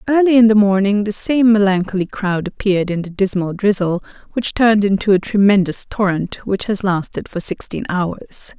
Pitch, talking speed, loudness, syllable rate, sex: 200 Hz, 175 wpm, -16 LUFS, 5.1 syllables/s, female